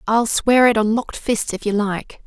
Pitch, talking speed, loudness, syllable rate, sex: 220 Hz, 240 wpm, -18 LUFS, 4.7 syllables/s, female